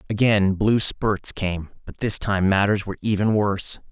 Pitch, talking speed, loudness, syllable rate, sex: 100 Hz, 170 wpm, -21 LUFS, 4.6 syllables/s, male